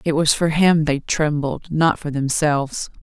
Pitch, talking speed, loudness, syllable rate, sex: 150 Hz, 180 wpm, -19 LUFS, 4.3 syllables/s, female